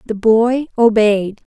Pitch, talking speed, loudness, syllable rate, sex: 220 Hz, 115 wpm, -14 LUFS, 3.5 syllables/s, female